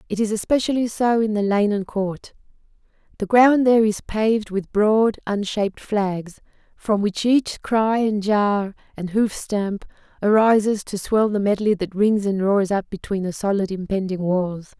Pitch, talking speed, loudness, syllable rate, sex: 205 Hz, 170 wpm, -20 LUFS, 4.5 syllables/s, female